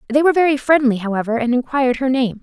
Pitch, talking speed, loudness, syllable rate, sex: 255 Hz, 225 wpm, -17 LUFS, 7.2 syllables/s, female